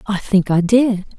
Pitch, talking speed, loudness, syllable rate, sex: 200 Hz, 205 wpm, -16 LUFS, 4.3 syllables/s, female